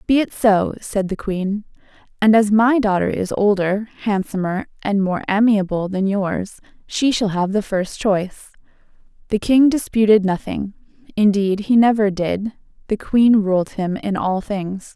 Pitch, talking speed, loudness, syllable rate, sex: 205 Hz, 150 wpm, -18 LUFS, 4.3 syllables/s, female